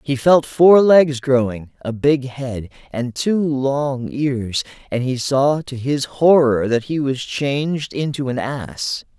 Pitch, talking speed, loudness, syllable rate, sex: 135 Hz, 165 wpm, -18 LUFS, 3.5 syllables/s, male